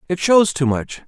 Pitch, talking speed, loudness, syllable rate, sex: 165 Hz, 225 wpm, -17 LUFS, 4.7 syllables/s, male